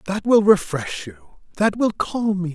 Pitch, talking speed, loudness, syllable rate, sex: 185 Hz, 190 wpm, -20 LUFS, 4.5 syllables/s, male